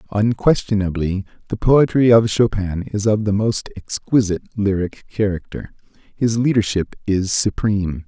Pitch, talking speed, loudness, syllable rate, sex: 105 Hz, 120 wpm, -18 LUFS, 4.7 syllables/s, male